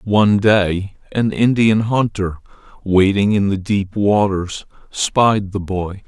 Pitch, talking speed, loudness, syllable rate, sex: 100 Hz, 130 wpm, -17 LUFS, 3.5 syllables/s, male